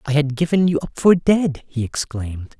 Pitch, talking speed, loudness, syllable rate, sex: 145 Hz, 210 wpm, -19 LUFS, 5.0 syllables/s, male